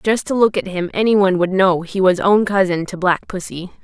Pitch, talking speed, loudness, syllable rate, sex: 190 Hz, 250 wpm, -17 LUFS, 5.5 syllables/s, female